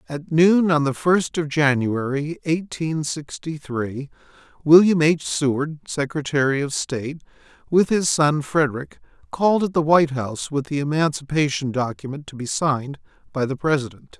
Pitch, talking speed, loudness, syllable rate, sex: 150 Hz, 150 wpm, -21 LUFS, 4.8 syllables/s, male